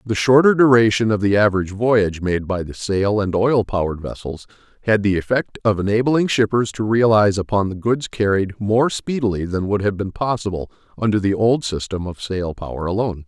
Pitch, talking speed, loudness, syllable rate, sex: 105 Hz, 190 wpm, -19 LUFS, 5.5 syllables/s, male